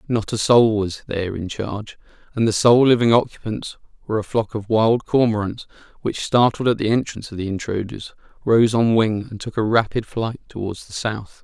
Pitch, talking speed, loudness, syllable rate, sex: 110 Hz, 195 wpm, -20 LUFS, 5.3 syllables/s, male